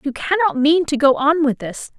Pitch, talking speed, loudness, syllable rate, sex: 295 Hz, 240 wpm, -17 LUFS, 4.9 syllables/s, female